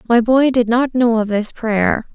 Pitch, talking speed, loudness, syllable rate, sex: 235 Hz, 225 wpm, -16 LUFS, 4.1 syllables/s, female